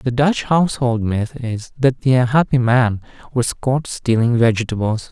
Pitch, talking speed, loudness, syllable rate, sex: 125 Hz, 155 wpm, -18 LUFS, 4.4 syllables/s, male